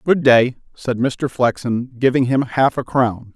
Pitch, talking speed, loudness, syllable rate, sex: 125 Hz, 180 wpm, -18 LUFS, 3.9 syllables/s, male